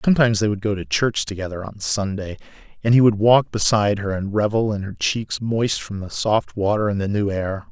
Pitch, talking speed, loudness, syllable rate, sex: 100 Hz, 225 wpm, -20 LUFS, 5.5 syllables/s, male